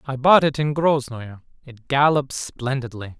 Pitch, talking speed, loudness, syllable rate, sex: 135 Hz, 150 wpm, -20 LUFS, 4.2 syllables/s, male